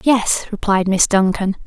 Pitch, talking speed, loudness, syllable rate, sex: 200 Hz, 145 wpm, -16 LUFS, 4.1 syllables/s, female